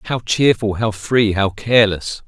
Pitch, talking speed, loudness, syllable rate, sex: 110 Hz, 160 wpm, -16 LUFS, 4.3 syllables/s, male